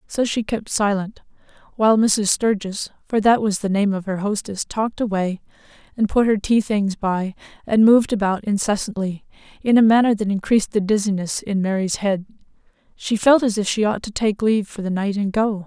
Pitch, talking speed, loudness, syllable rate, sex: 210 Hz, 195 wpm, -20 LUFS, 4.9 syllables/s, female